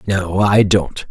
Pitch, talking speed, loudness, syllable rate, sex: 95 Hz, 165 wpm, -15 LUFS, 3.1 syllables/s, male